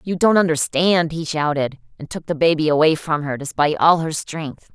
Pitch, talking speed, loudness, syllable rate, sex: 160 Hz, 200 wpm, -19 LUFS, 5.2 syllables/s, female